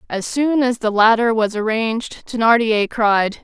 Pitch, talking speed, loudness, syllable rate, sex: 225 Hz, 155 wpm, -17 LUFS, 4.4 syllables/s, female